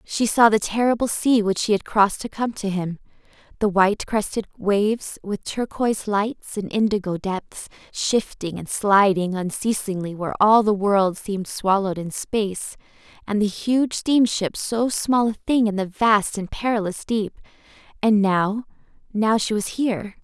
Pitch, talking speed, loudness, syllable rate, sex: 210 Hz, 155 wpm, -21 LUFS, 4.5 syllables/s, female